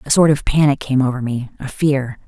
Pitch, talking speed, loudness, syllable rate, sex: 135 Hz, 240 wpm, -17 LUFS, 5.5 syllables/s, female